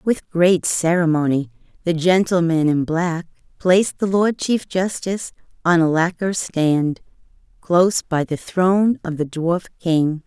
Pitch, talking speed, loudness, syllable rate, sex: 175 Hz, 140 wpm, -19 LUFS, 4.2 syllables/s, female